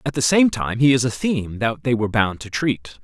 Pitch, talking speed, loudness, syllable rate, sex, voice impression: 120 Hz, 275 wpm, -20 LUFS, 5.5 syllables/s, male, masculine, adult-like, slightly tensed, soft, raspy, cool, friendly, reassuring, wild, lively, slightly kind